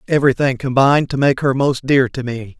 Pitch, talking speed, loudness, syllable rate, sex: 135 Hz, 210 wpm, -16 LUFS, 5.8 syllables/s, male